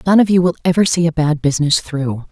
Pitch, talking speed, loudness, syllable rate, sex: 160 Hz, 260 wpm, -15 LUFS, 6.3 syllables/s, female